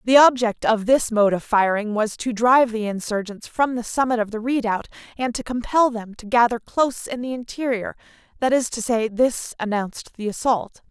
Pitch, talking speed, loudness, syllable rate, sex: 230 Hz, 200 wpm, -21 LUFS, 5.2 syllables/s, female